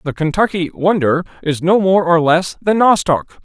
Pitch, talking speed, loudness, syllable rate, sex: 175 Hz, 175 wpm, -15 LUFS, 4.8 syllables/s, male